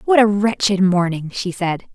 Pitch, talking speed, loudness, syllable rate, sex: 195 Hz, 185 wpm, -18 LUFS, 4.6 syllables/s, female